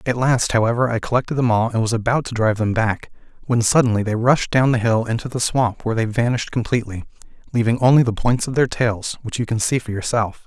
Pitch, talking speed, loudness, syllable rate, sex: 115 Hz, 235 wpm, -19 LUFS, 6.2 syllables/s, male